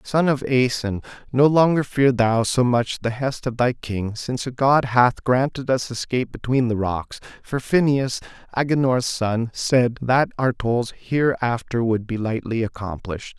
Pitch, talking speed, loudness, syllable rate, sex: 125 Hz, 165 wpm, -21 LUFS, 4.4 syllables/s, male